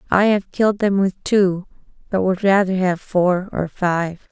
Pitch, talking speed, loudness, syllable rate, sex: 190 Hz, 180 wpm, -19 LUFS, 4.2 syllables/s, female